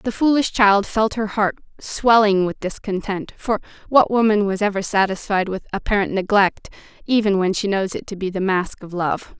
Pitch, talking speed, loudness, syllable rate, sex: 200 Hz, 185 wpm, -19 LUFS, 4.9 syllables/s, female